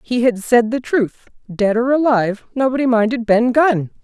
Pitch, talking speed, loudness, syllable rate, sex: 235 Hz, 180 wpm, -16 LUFS, 4.9 syllables/s, female